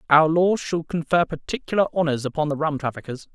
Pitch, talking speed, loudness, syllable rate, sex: 160 Hz, 180 wpm, -22 LUFS, 6.0 syllables/s, male